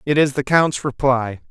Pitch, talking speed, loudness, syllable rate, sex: 135 Hz, 200 wpm, -18 LUFS, 4.6 syllables/s, male